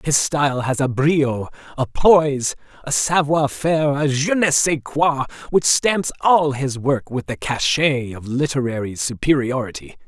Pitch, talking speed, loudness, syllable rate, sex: 140 Hz, 155 wpm, -19 LUFS, 4.3 syllables/s, male